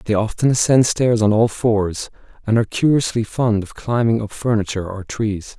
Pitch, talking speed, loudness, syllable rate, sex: 110 Hz, 185 wpm, -18 LUFS, 5.1 syllables/s, male